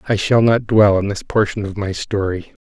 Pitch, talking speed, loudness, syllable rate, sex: 105 Hz, 225 wpm, -17 LUFS, 5.0 syllables/s, male